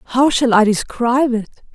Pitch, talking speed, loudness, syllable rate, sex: 240 Hz, 170 wpm, -15 LUFS, 4.9 syllables/s, female